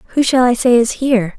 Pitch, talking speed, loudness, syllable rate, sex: 240 Hz, 260 wpm, -14 LUFS, 6.7 syllables/s, female